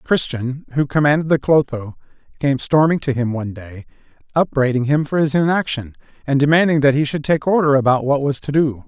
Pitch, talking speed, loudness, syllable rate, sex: 140 Hz, 190 wpm, -17 LUFS, 5.7 syllables/s, male